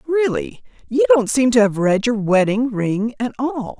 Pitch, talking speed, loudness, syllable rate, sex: 245 Hz, 190 wpm, -18 LUFS, 4.5 syllables/s, female